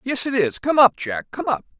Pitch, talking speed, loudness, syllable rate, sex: 220 Hz, 270 wpm, -20 LUFS, 5.1 syllables/s, male